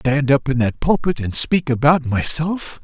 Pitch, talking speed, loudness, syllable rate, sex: 140 Hz, 210 wpm, -18 LUFS, 4.7 syllables/s, male